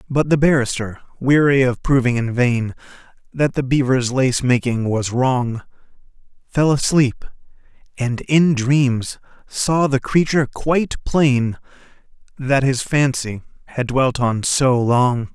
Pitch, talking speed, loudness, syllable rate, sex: 130 Hz, 130 wpm, -18 LUFS, 3.8 syllables/s, male